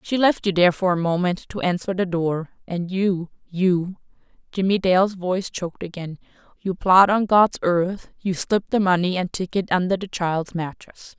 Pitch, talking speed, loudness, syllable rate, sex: 185 Hz, 160 wpm, -21 LUFS, 4.8 syllables/s, female